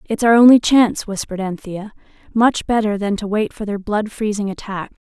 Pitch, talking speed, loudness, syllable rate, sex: 210 Hz, 190 wpm, -17 LUFS, 5.4 syllables/s, female